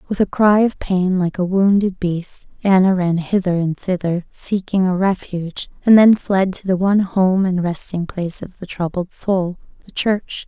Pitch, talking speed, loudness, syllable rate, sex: 185 Hz, 185 wpm, -18 LUFS, 4.6 syllables/s, female